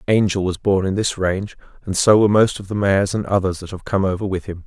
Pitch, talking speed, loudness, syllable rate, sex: 100 Hz, 270 wpm, -19 LUFS, 6.3 syllables/s, male